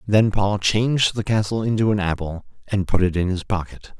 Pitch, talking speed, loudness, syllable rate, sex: 100 Hz, 210 wpm, -21 LUFS, 5.3 syllables/s, male